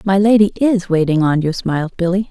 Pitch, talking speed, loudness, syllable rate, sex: 185 Hz, 210 wpm, -15 LUFS, 5.7 syllables/s, female